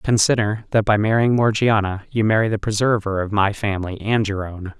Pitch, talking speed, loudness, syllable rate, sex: 105 Hz, 190 wpm, -19 LUFS, 5.4 syllables/s, male